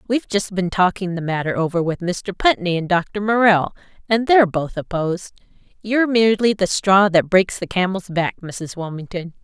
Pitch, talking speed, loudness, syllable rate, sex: 190 Hz, 180 wpm, -19 LUFS, 5.2 syllables/s, female